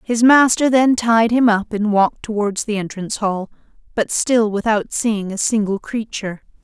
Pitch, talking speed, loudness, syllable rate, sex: 215 Hz, 170 wpm, -17 LUFS, 4.7 syllables/s, female